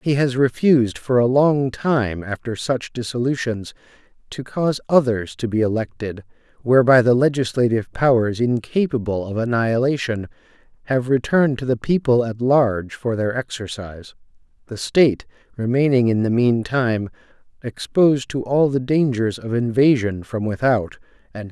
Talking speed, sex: 145 wpm, male